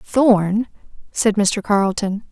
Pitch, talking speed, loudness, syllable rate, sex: 210 Hz, 105 wpm, -18 LUFS, 3.4 syllables/s, female